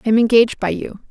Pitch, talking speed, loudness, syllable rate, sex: 220 Hz, 270 wpm, -16 LUFS, 7.5 syllables/s, female